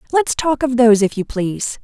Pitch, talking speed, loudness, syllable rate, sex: 245 Hz, 260 wpm, -16 LUFS, 6.3 syllables/s, female